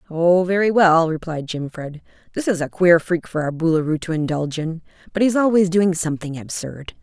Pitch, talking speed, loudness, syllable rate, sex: 170 Hz, 195 wpm, -19 LUFS, 5.6 syllables/s, female